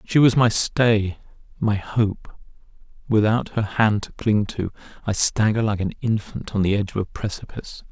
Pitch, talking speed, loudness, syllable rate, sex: 105 Hz, 175 wpm, -22 LUFS, 4.8 syllables/s, male